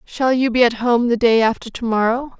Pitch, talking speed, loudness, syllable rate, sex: 240 Hz, 250 wpm, -17 LUFS, 5.3 syllables/s, female